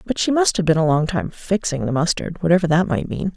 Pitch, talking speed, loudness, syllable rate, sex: 180 Hz, 270 wpm, -19 LUFS, 5.9 syllables/s, female